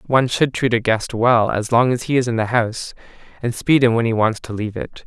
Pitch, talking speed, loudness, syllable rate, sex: 115 Hz, 270 wpm, -18 LUFS, 5.7 syllables/s, male